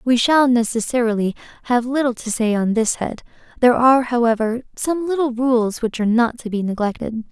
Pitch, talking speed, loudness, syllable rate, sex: 240 Hz, 180 wpm, -19 LUFS, 5.6 syllables/s, female